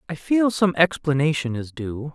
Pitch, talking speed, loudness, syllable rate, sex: 155 Hz, 170 wpm, -22 LUFS, 4.7 syllables/s, male